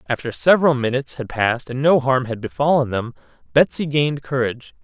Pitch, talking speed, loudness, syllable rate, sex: 130 Hz, 175 wpm, -19 LUFS, 6.2 syllables/s, male